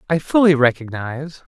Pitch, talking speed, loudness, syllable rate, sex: 145 Hz, 115 wpm, -17 LUFS, 5.4 syllables/s, male